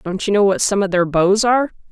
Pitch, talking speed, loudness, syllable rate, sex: 200 Hz, 285 wpm, -16 LUFS, 6.1 syllables/s, female